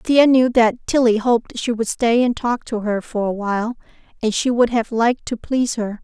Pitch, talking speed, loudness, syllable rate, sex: 230 Hz, 230 wpm, -18 LUFS, 5.2 syllables/s, female